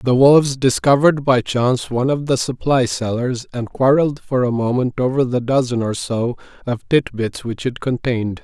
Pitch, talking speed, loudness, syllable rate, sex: 125 Hz, 185 wpm, -18 LUFS, 5.2 syllables/s, male